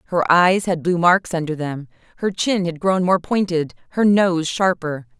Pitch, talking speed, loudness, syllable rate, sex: 175 Hz, 185 wpm, -19 LUFS, 4.4 syllables/s, female